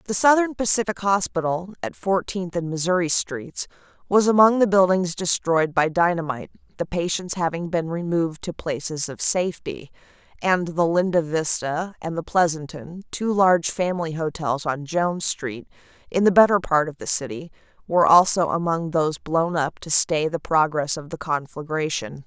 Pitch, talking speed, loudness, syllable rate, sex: 170 Hz, 160 wpm, -22 LUFS, 5.0 syllables/s, female